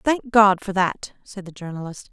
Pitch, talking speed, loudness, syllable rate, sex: 195 Hz, 200 wpm, -19 LUFS, 4.8 syllables/s, female